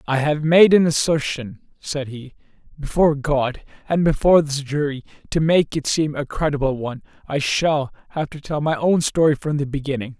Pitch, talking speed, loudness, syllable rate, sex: 145 Hz, 180 wpm, -20 LUFS, 5.2 syllables/s, male